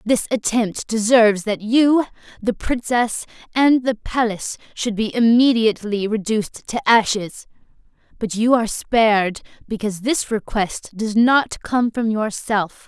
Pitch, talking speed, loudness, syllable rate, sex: 225 Hz, 130 wpm, -19 LUFS, 4.4 syllables/s, female